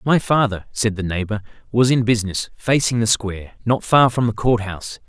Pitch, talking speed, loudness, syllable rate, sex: 110 Hz, 200 wpm, -19 LUFS, 5.4 syllables/s, male